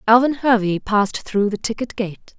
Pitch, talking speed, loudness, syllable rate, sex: 220 Hz, 175 wpm, -19 LUFS, 4.9 syllables/s, female